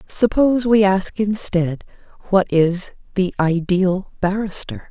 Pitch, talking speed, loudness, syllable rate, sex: 195 Hz, 110 wpm, -19 LUFS, 3.8 syllables/s, female